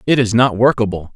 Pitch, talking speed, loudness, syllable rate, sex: 115 Hz, 205 wpm, -15 LUFS, 6.0 syllables/s, male